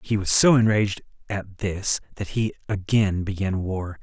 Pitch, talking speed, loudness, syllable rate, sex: 100 Hz, 165 wpm, -23 LUFS, 4.5 syllables/s, male